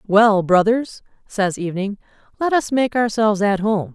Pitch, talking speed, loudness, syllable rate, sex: 210 Hz, 150 wpm, -18 LUFS, 4.7 syllables/s, female